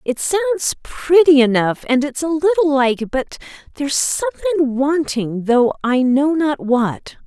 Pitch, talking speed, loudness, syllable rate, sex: 285 Hz, 150 wpm, -17 LUFS, 4.5 syllables/s, female